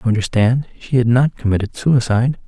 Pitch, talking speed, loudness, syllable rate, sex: 120 Hz, 170 wpm, -17 LUFS, 5.8 syllables/s, male